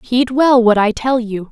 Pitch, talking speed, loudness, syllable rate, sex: 240 Hz, 235 wpm, -14 LUFS, 4.3 syllables/s, female